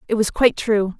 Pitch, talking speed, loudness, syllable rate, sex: 215 Hz, 240 wpm, -19 LUFS, 6.1 syllables/s, female